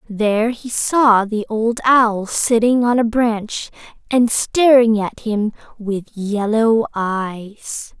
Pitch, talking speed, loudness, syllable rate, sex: 225 Hz, 130 wpm, -17 LUFS, 3.0 syllables/s, female